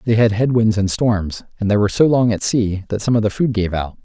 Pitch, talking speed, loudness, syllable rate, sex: 105 Hz, 295 wpm, -17 LUFS, 5.8 syllables/s, male